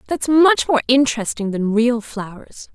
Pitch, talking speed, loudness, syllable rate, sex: 245 Hz, 155 wpm, -17 LUFS, 4.5 syllables/s, female